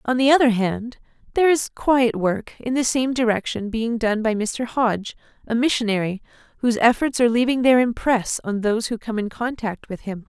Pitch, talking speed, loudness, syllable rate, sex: 235 Hz, 190 wpm, -21 LUFS, 5.4 syllables/s, female